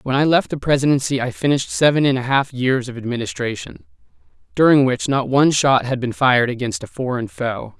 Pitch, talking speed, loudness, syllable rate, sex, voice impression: 130 Hz, 200 wpm, -18 LUFS, 5.9 syllables/s, male, very masculine, slightly young, slightly thick, tensed, slightly powerful, very bright, hard, very clear, very fluent, cool, intellectual, very refreshing, very sincere, calm, slightly mature, friendly, reassuring, slightly unique, slightly elegant, wild, slightly sweet, lively, kind, slightly intense, slightly light